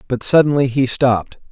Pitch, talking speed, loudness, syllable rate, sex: 130 Hz, 160 wpm, -16 LUFS, 5.5 syllables/s, male